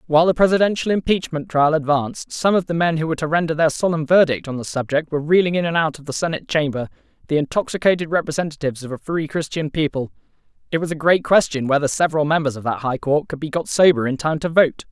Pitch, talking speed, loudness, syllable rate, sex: 155 Hz, 225 wpm, -19 LUFS, 6.7 syllables/s, male